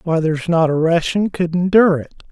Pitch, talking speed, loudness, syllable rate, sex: 170 Hz, 205 wpm, -16 LUFS, 5.8 syllables/s, male